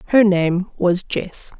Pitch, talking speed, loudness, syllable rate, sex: 190 Hz, 150 wpm, -18 LUFS, 3.2 syllables/s, female